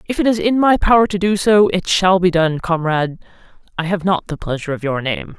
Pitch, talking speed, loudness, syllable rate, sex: 180 Hz, 235 wpm, -16 LUFS, 5.9 syllables/s, female